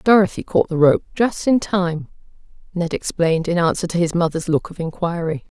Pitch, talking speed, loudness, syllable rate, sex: 175 Hz, 180 wpm, -19 LUFS, 5.4 syllables/s, female